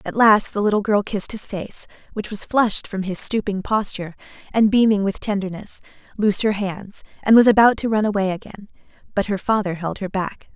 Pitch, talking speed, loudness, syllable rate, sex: 205 Hz, 200 wpm, -20 LUFS, 5.6 syllables/s, female